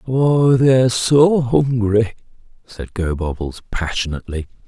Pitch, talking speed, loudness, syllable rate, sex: 115 Hz, 90 wpm, -17 LUFS, 3.9 syllables/s, male